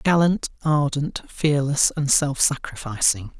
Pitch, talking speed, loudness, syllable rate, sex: 145 Hz, 105 wpm, -21 LUFS, 3.8 syllables/s, male